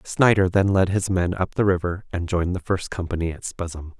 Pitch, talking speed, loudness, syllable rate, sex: 90 Hz, 225 wpm, -23 LUFS, 5.5 syllables/s, male